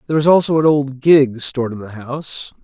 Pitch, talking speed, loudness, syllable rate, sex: 140 Hz, 230 wpm, -16 LUFS, 5.9 syllables/s, male